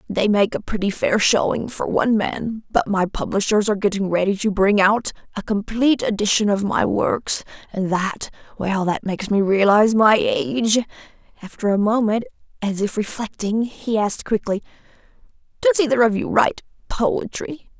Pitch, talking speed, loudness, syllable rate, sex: 210 Hz, 160 wpm, -20 LUFS, 5.0 syllables/s, female